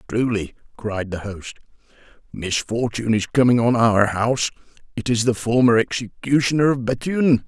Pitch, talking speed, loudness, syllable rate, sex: 115 Hz, 135 wpm, -20 LUFS, 5.1 syllables/s, male